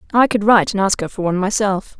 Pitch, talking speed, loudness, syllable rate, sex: 200 Hz, 270 wpm, -16 LUFS, 7.1 syllables/s, female